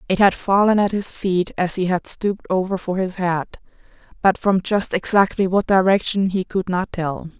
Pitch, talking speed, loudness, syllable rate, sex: 190 Hz, 185 wpm, -19 LUFS, 4.8 syllables/s, female